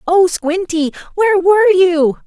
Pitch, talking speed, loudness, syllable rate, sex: 360 Hz, 135 wpm, -13 LUFS, 7.1 syllables/s, female